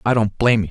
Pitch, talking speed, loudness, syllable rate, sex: 110 Hz, 340 wpm, -18 LUFS, 8.2 syllables/s, male